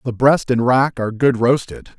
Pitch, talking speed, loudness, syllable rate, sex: 125 Hz, 210 wpm, -16 LUFS, 5.0 syllables/s, male